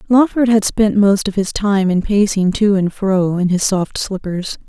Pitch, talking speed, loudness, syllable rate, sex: 200 Hz, 205 wpm, -15 LUFS, 4.3 syllables/s, female